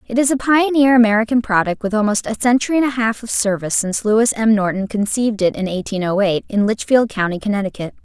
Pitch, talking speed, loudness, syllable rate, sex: 220 Hz, 215 wpm, -17 LUFS, 6.4 syllables/s, female